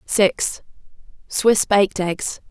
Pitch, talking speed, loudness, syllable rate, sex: 195 Hz, 70 wpm, -19 LUFS, 3.1 syllables/s, female